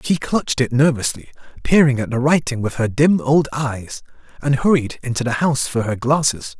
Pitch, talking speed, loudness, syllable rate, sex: 130 Hz, 190 wpm, -18 LUFS, 5.3 syllables/s, male